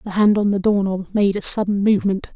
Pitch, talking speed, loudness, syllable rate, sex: 200 Hz, 255 wpm, -18 LUFS, 6.1 syllables/s, female